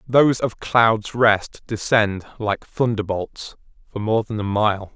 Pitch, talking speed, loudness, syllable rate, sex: 110 Hz, 145 wpm, -20 LUFS, 3.6 syllables/s, male